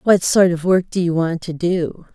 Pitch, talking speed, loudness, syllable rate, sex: 175 Hz, 250 wpm, -18 LUFS, 4.5 syllables/s, female